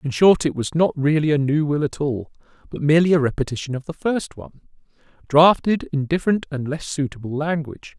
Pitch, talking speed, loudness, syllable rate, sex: 150 Hz, 195 wpm, -20 LUFS, 5.9 syllables/s, male